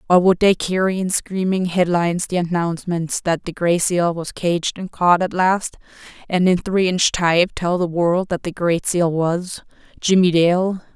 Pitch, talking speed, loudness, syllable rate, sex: 175 Hz, 180 wpm, -19 LUFS, 4.4 syllables/s, female